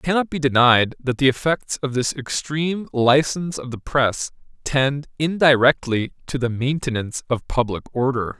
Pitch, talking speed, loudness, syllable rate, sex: 135 Hz, 155 wpm, -20 LUFS, 4.9 syllables/s, male